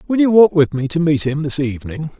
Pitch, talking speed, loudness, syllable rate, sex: 155 Hz, 275 wpm, -15 LUFS, 6.0 syllables/s, male